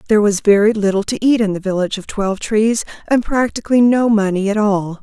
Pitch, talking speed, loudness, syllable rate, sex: 210 Hz, 215 wpm, -16 LUFS, 6.1 syllables/s, female